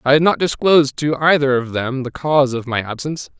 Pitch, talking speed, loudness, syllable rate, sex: 140 Hz, 230 wpm, -17 LUFS, 6.0 syllables/s, male